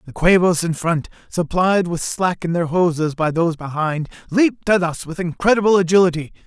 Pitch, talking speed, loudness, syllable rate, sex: 170 Hz, 175 wpm, -18 LUFS, 5.3 syllables/s, male